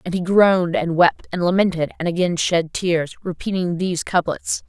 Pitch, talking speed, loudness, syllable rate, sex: 175 Hz, 180 wpm, -19 LUFS, 5.0 syllables/s, female